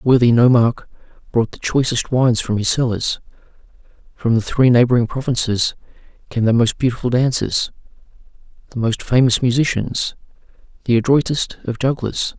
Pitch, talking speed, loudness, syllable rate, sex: 120 Hz, 135 wpm, -17 LUFS, 5.4 syllables/s, male